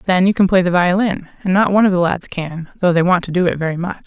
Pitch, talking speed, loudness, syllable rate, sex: 180 Hz, 310 wpm, -16 LUFS, 6.7 syllables/s, female